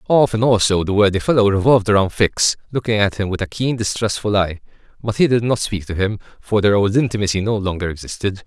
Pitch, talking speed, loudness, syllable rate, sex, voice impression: 105 Hz, 215 wpm, -18 LUFS, 6.1 syllables/s, male, masculine, adult-like, tensed, powerful, slightly hard, clear, fluent, slightly refreshing, friendly, slightly wild, lively, slightly strict, slightly intense